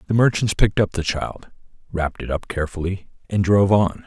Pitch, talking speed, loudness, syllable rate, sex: 95 Hz, 190 wpm, -21 LUFS, 6.0 syllables/s, male